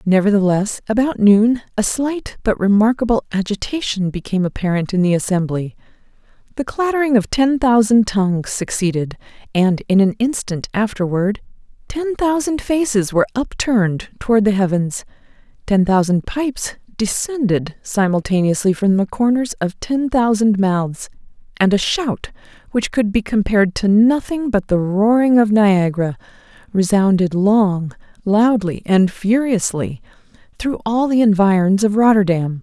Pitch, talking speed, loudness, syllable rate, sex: 210 Hz, 130 wpm, -17 LUFS, 4.7 syllables/s, female